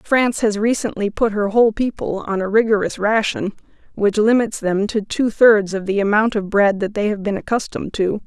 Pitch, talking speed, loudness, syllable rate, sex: 210 Hz, 205 wpm, -18 LUFS, 5.3 syllables/s, female